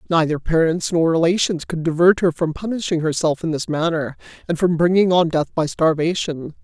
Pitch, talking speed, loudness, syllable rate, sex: 165 Hz, 180 wpm, -19 LUFS, 5.3 syllables/s, male